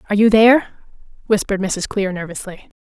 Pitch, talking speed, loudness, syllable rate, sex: 200 Hz, 150 wpm, -16 LUFS, 6.7 syllables/s, female